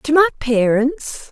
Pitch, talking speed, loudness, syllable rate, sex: 265 Hz, 135 wpm, -16 LUFS, 3.3 syllables/s, female